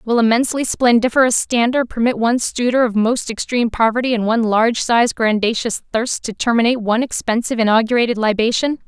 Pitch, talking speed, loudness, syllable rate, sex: 235 Hz, 150 wpm, -16 LUFS, 6.3 syllables/s, female